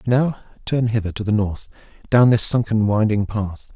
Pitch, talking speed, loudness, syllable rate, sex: 110 Hz, 190 wpm, -19 LUFS, 5.0 syllables/s, male